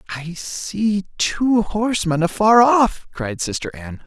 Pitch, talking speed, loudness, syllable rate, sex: 195 Hz, 135 wpm, -19 LUFS, 4.3 syllables/s, male